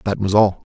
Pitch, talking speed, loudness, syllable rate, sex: 100 Hz, 255 wpm, -17 LUFS, 5.6 syllables/s, male